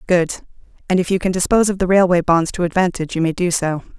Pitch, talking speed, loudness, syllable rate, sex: 180 Hz, 240 wpm, -17 LUFS, 6.7 syllables/s, female